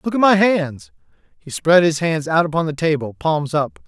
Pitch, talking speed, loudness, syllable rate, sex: 165 Hz, 215 wpm, -17 LUFS, 4.9 syllables/s, male